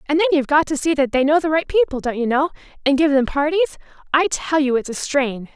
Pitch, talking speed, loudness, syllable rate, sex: 290 Hz, 240 wpm, -19 LUFS, 6.3 syllables/s, female